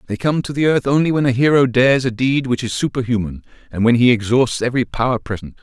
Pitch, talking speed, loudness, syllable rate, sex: 125 Hz, 235 wpm, -17 LUFS, 6.4 syllables/s, male